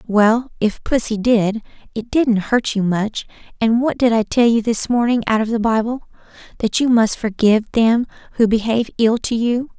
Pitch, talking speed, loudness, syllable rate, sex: 225 Hz, 185 wpm, -17 LUFS, 4.8 syllables/s, female